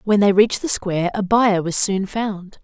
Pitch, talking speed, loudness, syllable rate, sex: 200 Hz, 230 wpm, -18 LUFS, 4.8 syllables/s, female